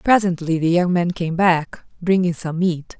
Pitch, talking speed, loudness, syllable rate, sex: 175 Hz, 180 wpm, -19 LUFS, 4.4 syllables/s, female